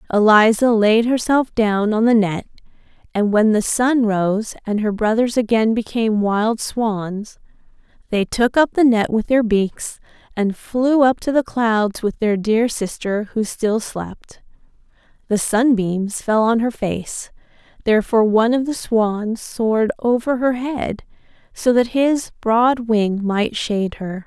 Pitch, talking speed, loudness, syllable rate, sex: 225 Hz, 155 wpm, -18 LUFS, 3.9 syllables/s, female